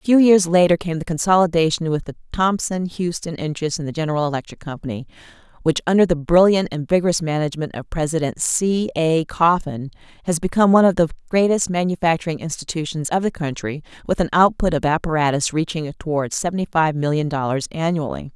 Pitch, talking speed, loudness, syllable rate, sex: 165 Hz, 170 wpm, -19 LUFS, 6.1 syllables/s, female